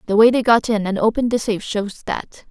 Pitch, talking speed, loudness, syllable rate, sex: 215 Hz, 265 wpm, -18 LUFS, 6.3 syllables/s, female